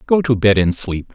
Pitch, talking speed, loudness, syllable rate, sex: 115 Hz, 260 wpm, -16 LUFS, 5.0 syllables/s, male